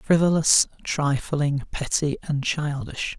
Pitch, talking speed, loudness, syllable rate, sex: 145 Hz, 95 wpm, -23 LUFS, 3.4 syllables/s, male